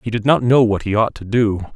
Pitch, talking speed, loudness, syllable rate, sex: 110 Hz, 305 wpm, -17 LUFS, 5.7 syllables/s, male